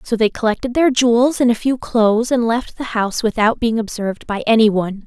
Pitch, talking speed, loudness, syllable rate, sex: 230 Hz, 215 wpm, -17 LUFS, 5.6 syllables/s, female